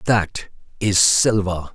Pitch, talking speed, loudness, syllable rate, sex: 95 Hz, 105 wpm, -18 LUFS, 3.1 syllables/s, male